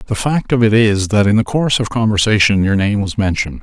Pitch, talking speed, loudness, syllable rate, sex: 105 Hz, 250 wpm, -14 LUFS, 6.1 syllables/s, male